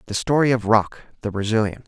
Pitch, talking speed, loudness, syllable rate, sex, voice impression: 110 Hz, 190 wpm, -20 LUFS, 5.9 syllables/s, male, masculine, adult-like, tensed, bright, clear, fluent, intellectual, friendly, reassuring, lively, light